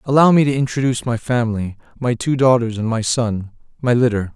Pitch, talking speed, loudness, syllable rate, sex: 120 Hz, 180 wpm, -18 LUFS, 5.9 syllables/s, male